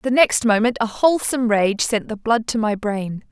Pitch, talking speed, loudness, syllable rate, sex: 225 Hz, 215 wpm, -19 LUFS, 5.0 syllables/s, female